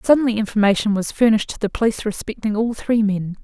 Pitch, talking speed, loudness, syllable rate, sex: 215 Hz, 190 wpm, -19 LUFS, 6.8 syllables/s, female